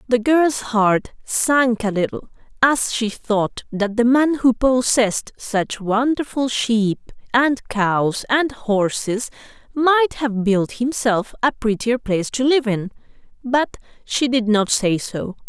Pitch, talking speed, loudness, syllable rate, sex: 235 Hz, 145 wpm, -19 LUFS, 3.6 syllables/s, female